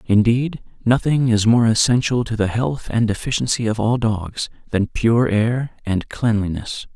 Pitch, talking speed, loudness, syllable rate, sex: 115 Hz, 155 wpm, -19 LUFS, 4.3 syllables/s, male